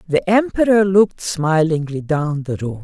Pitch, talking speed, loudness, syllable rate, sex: 170 Hz, 150 wpm, -17 LUFS, 4.5 syllables/s, female